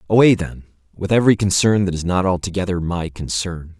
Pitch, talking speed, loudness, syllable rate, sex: 90 Hz, 175 wpm, -18 LUFS, 5.7 syllables/s, male